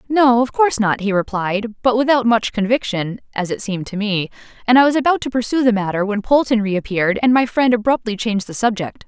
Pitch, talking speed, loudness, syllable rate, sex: 225 Hz, 220 wpm, -17 LUFS, 5.9 syllables/s, female